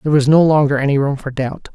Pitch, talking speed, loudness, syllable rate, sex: 145 Hz, 275 wpm, -15 LUFS, 6.6 syllables/s, male